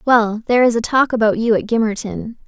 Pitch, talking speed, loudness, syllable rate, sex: 225 Hz, 220 wpm, -16 LUFS, 5.8 syllables/s, female